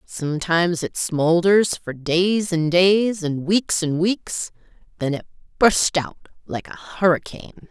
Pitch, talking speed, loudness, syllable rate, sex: 175 Hz, 140 wpm, -20 LUFS, 3.8 syllables/s, female